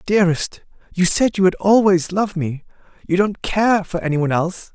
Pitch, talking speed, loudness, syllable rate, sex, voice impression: 185 Hz, 165 wpm, -18 LUFS, 5.1 syllables/s, male, masculine, slightly young, adult-like, slightly thick, tensed, slightly powerful, bright, slightly soft, very clear, fluent, very cool, intellectual, very refreshing, sincere, calm, friendly, reassuring, slightly unique, slightly wild, sweet, very lively, very kind